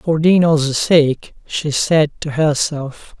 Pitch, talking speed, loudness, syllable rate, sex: 150 Hz, 130 wpm, -16 LUFS, 3.1 syllables/s, male